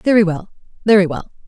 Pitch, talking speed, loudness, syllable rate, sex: 190 Hz, 160 wpm, -16 LUFS, 6.2 syllables/s, female